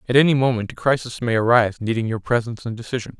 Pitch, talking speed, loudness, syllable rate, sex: 120 Hz, 225 wpm, -20 LUFS, 7.4 syllables/s, male